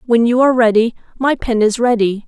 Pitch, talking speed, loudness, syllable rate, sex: 235 Hz, 210 wpm, -14 LUFS, 5.8 syllables/s, female